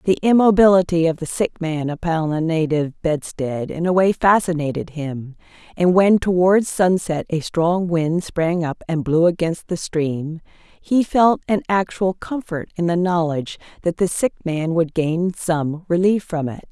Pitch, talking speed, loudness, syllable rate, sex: 170 Hz, 170 wpm, -19 LUFS, 4.3 syllables/s, female